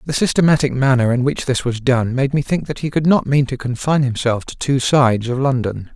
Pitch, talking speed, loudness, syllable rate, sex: 130 Hz, 240 wpm, -17 LUFS, 5.7 syllables/s, male